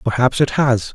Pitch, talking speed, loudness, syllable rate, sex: 125 Hz, 190 wpm, -17 LUFS, 4.7 syllables/s, male